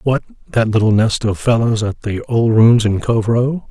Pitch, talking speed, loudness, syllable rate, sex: 110 Hz, 210 wpm, -15 LUFS, 4.7 syllables/s, male